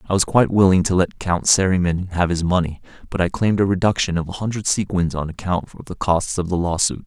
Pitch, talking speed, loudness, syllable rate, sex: 90 Hz, 240 wpm, -19 LUFS, 6.2 syllables/s, male